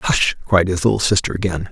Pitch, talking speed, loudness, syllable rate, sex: 90 Hz, 210 wpm, -17 LUFS, 5.7 syllables/s, male